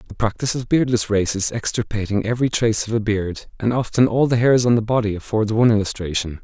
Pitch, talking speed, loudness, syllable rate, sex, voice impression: 110 Hz, 205 wpm, -19 LUFS, 6.3 syllables/s, male, very masculine, very adult-like, very thick, slightly relaxed, slightly weak, slightly dark, soft, slightly muffled, fluent, slightly raspy, cool, intellectual, slightly refreshing, slightly sincere, very calm, slightly mature, slightly friendly, slightly reassuring, slightly unique, slightly elegant, sweet, slightly lively, kind, very modest